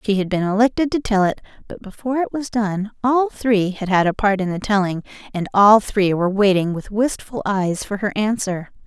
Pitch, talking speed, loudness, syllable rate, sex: 205 Hz, 215 wpm, -19 LUFS, 5.2 syllables/s, female